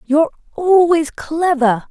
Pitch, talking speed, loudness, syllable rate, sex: 315 Hz, 95 wpm, -15 LUFS, 3.8 syllables/s, female